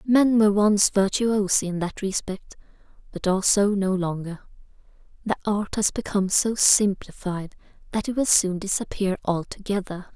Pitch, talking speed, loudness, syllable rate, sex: 200 Hz, 140 wpm, -23 LUFS, 4.8 syllables/s, female